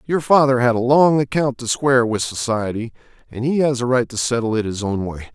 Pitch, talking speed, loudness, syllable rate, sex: 125 Hz, 235 wpm, -18 LUFS, 5.7 syllables/s, male